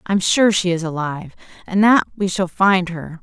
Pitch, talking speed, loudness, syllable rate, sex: 185 Hz, 205 wpm, -17 LUFS, 4.9 syllables/s, female